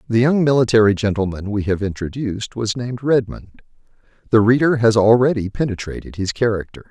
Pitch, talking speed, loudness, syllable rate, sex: 115 Hz, 150 wpm, -18 LUFS, 5.8 syllables/s, male